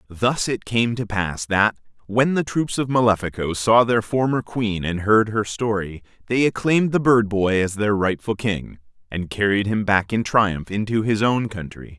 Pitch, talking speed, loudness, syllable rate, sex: 105 Hz, 190 wpm, -20 LUFS, 4.5 syllables/s, male